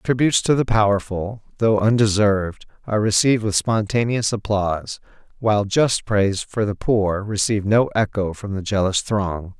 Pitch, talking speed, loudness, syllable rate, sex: 105 Hz, 150 wpm, -20 LUFS, 5.0 syllables/s, male